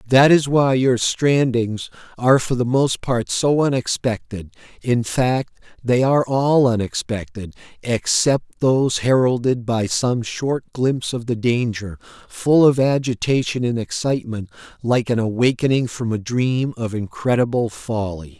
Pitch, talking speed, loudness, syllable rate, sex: 120 Hz, 135 wpm, -19 LUFS, 4.3 syllables/s, male